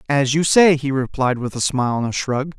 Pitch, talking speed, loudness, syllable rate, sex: 140 Hz, 230 wpm, -18 LUFS, 5.0 syllables/s, male